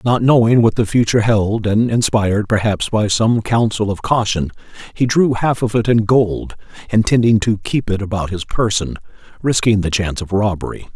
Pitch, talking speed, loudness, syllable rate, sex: 110 Hz, 180 wpm, -16 LUFS, 5.1 syllables/s, male